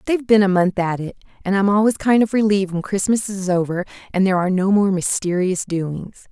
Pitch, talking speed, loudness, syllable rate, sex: 195 Hz, 220 wpm, -19 LUFS, 5.9 syllables/s, female